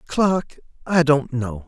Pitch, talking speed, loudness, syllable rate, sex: 145 Hz, 145 wpm, -20 LUFS, 3.2 syllables/s, male